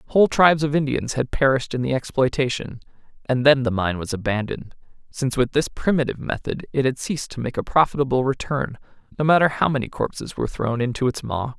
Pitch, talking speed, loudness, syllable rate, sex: 130 Hz, 195 wpm, -22 LUFS, 6.3 syllables/s, male